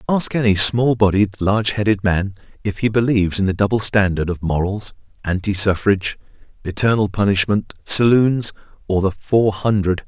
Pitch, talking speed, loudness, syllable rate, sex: 100 Hz, 150 wpm, -18 LUFS, 5.1 syllables/s, male